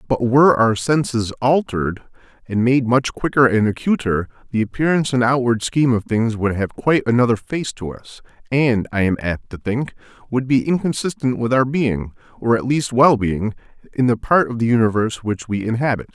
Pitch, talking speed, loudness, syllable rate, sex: 120 Hz, 185 wpm, -18 LUFS, 5.3 syllables/s, male